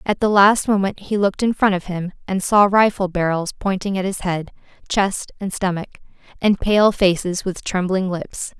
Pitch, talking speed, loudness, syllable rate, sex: 195 Hz, 190 wpm, -19 LUFS, 4.9 syllables/s, female